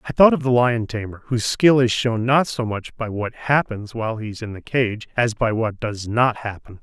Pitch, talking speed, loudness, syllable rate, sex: 115 Hz, 245 wpm, -20 LUFS, 5.0 syllables/s, male